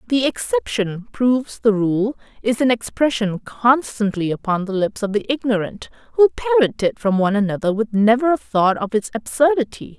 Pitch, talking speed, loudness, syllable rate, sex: 230 Hz, 170 wpm, -19 LUFS, 5.2 syllables/s, female